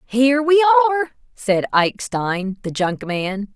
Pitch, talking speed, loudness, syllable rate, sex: 240 Hz, 150 wpm, -18 LUFS, 4.9 syllables/s, female